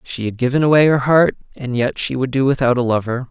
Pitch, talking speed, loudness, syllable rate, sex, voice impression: 130 Hz, 255 wpm, -16 LUFS, 5.9 syllables/s, male, masculine, adult-like, tensed, powerful, bright, clear, fluent, nasal, cool, slightly refreshing, friendly, reassuring, slightly wild, lively, kind